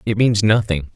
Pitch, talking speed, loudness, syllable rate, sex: 105 Hz, 190 wpm, -17 LUFS, 4.9 syllables/s, male